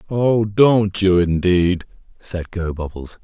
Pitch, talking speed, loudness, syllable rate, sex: 95 Hz, 110 wpm, -18 LUFS, 3.3 syllables/s, male